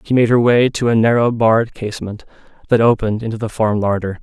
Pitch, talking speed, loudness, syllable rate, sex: 110 Hz, 215 wpm, -15 LUFS, 6.3 syllables/s, male